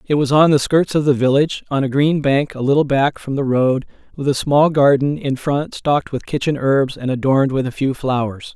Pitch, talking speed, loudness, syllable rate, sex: 140 Hz, 240 wpm, -17 LUFS, 5.3 syllables/s, male